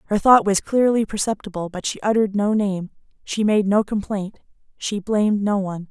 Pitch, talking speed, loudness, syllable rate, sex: 205 Hz, 185 wpm, -20 LUFS, 5.4 syllables/s, female